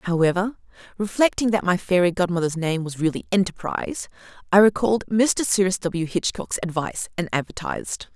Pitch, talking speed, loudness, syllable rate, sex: 185 Hz, 140 wpm, -22 LUFS, 5.6 syllables/s, female